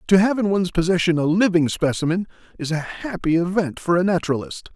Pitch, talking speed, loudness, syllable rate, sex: 175 Hz, 190 wpm, -20 LUFS, 6.2 syllables/s, male